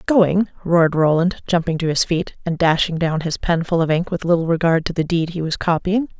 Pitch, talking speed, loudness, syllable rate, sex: 170 Hz, 230 wpm, -19 LUFS, 5.5 syllables/s, female